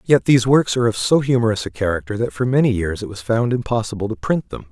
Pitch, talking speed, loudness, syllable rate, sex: 115 Hz, 255 wpm, -19 LUFS, 6.6 syllables/s, male